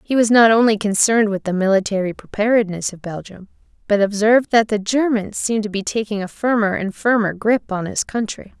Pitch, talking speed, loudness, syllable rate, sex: 210 Hz, 195 wpm, -18 LUFS, 5.7 syllables/s, female